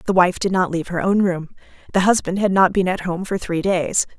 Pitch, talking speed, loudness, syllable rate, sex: 185 Hz, 260 wpm, -19 LUFS, 5.6 syllables/s, female